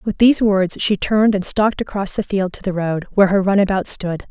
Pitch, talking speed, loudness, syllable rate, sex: 195 Hz, 235 wpm, -17 LUFS, 5.9 syllables/s, female